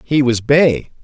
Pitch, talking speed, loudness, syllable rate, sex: 130 Hz, 175 wpm, -14 LUFS, 3.6 syllables/s, male